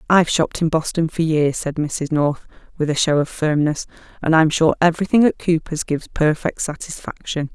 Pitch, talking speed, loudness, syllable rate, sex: 160 Hz, 185 wpm, -19 LUFS, 5.4 syllables/s, female